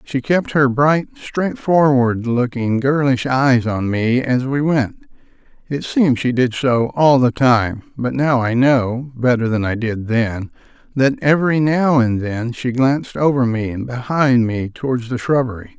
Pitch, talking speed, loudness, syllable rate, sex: 125 Hz, 170 wpm, -17 LUFS, 4.1 syllables/s, male